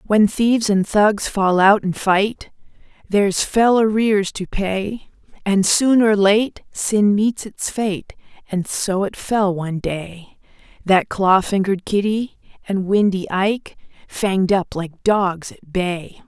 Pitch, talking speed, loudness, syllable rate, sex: 200 Hz, 150 wpm, -18 LUFS, 3.7 syllables/s, female